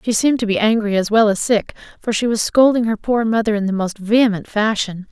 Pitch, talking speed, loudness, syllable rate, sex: 215 Hz, 245 wpm, -17 LUFS, 5.9 syllables/s, female